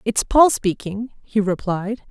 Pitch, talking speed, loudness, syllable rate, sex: 215 Hz, 145 wpm, -19 LUFS, 3.8 syllables/s, female